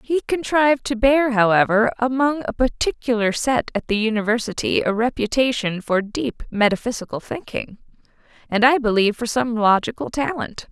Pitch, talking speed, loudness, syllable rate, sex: 235 Hz, 140 wpm, -20 LUFS, 5.2 syllables/s, female